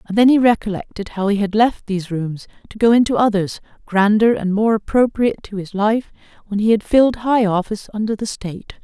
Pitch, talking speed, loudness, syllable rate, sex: 210 Hz, 205 wpm, -17 LUFS, 5.8 syllables/s, female